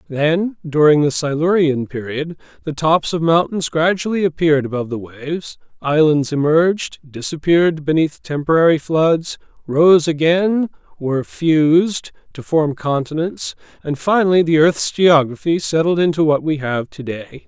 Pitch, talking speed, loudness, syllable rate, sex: 155 Hz, 130 wpm, -17 LUFS, 4.6 syllables/s, male